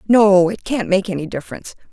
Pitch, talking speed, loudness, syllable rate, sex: 195 Hz, 190 wpm, -17 LUFS, 6.2 syllables/s, female